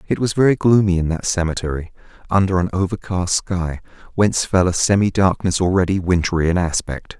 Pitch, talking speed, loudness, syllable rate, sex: 90 Hz, 165 wpm, -18 LUFS, 5.6 syllables/s, male